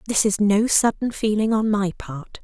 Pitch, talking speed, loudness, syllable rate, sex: 210 Hz, 195 wpm, -20 LUFS, 4.6 syllables/s, female